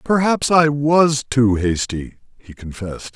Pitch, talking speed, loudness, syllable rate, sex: 130 Hz, 135 wpm, -17 LUFS, 4.1 syllables/s, male